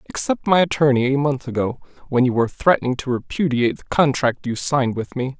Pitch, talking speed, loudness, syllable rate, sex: 135 Hz, 200 wpm, -20 LUFS, 6.0 syllables/s, male